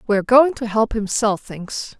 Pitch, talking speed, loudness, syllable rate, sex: 220 Hz, 210 wpm, -19 LUFS, 4.4 syllables/s, female